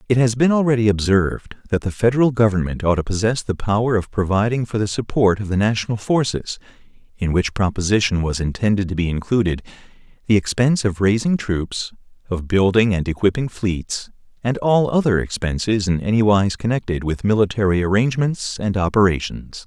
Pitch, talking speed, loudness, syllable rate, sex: 105 Hz, 165 wpm, -19 LUFS, 5.6 syllables/s, male